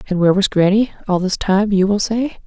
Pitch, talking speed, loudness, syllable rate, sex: 200 Hz, 245 wpm, -16 LUFS, 5.7 syllables/s, female